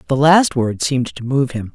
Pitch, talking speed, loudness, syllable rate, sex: 130 Hz, 240 wpm, -16 LUFS, 5.2 syllables/s, female